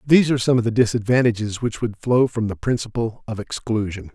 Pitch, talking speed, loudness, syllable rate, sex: 115 Hz, 205 wpm, -21 LUFS, 6.1 syllables/s, male